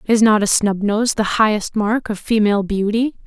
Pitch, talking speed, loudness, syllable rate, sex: 215 Hz, 185 wpm, -17 LUFS, 5.1 syllables/s, female